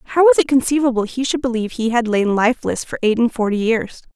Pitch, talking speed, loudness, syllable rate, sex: 235 Hz, 230 wpm, -17 LUFS, 6.0 syllables/s, female